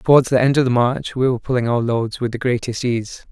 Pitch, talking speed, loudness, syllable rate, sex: 125 Hz, 270 wpm, -18 LUFS, 6.1 syllables/s, male